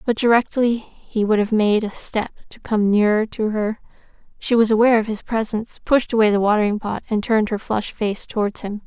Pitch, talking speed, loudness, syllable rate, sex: 215 Hz, 210 wpm, -20 LUFS, 5.6 syllables/s, female